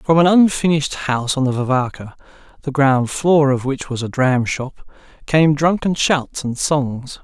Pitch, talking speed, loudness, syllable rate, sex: 140 Hz, 165 wpm, -17 LUFS, 4.5 syllables/s, male